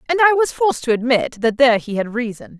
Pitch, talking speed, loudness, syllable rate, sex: 260 Hz, 255 wpm, -17 LUFS, 6.3 syllables/s, female